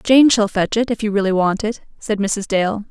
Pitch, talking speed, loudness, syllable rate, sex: 210 Hz, 250 wpm, -17 LUFS, 4.9 syllables/s, female